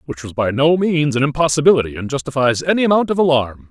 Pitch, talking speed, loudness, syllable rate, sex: 145 Hz, 210 wpm, -16 LUFS, 6.4 syllables/s, male